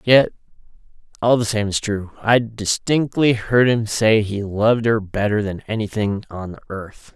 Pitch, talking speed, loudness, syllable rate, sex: 110 Hz, 160 wpm, -19 LUFS, 4.2 syllables/s, male